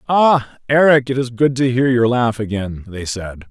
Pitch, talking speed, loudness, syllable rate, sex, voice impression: 125 Hz, 205 wpm, -16 LUFS, 4.4 syllables/s, male, masculine, middle-aged, tensed, powerful, clear, slightly fluent, cool, intellectual, calm, mature, friendly, reassuring, wild, lively, slightly strict